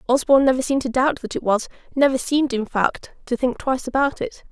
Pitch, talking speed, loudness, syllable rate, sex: 260 Hz, 210 wpm, -21 LUFS, 6.4 syllables/s, female